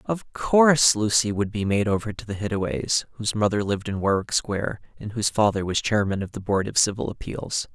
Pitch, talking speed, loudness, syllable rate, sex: 105 Hz, 210 wpm, -23 LUFS, 5.7 syllables/s, male